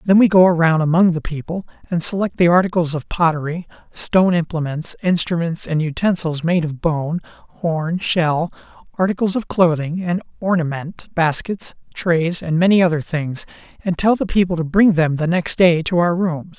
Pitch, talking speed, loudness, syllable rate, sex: 170 Hz, 170 wpm, -18 LUFS, 4.9 syllables/s, male